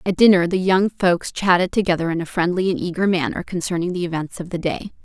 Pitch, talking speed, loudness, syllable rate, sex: 180 Hz, 225 wpm, -20 LUFS, 6.0 syllables/s, female